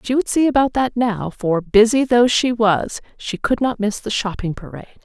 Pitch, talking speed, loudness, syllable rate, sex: 225 Hz, 215 wpm, -18 LUFS, 5.0 syllables/s, female